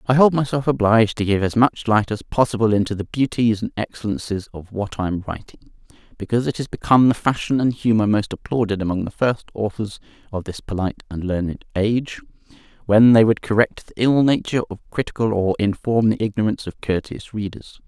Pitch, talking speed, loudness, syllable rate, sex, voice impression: 110 Hz, 190 wpm, -20 LUFS, 5.9 syllables/s, male, masculine, adult-like, fluent, slightly refreshing, slightly unique